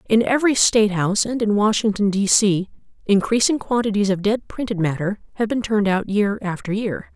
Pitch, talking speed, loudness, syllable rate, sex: 210 Hz, 185 wpm, -19 LUFS, 5.6 syllables/s, female